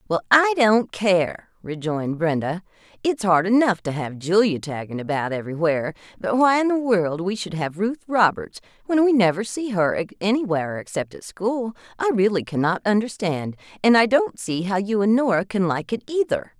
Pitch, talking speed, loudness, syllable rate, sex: 195 Hz, 180 wpm, -21 LUFS, 5.0 syllables/s, female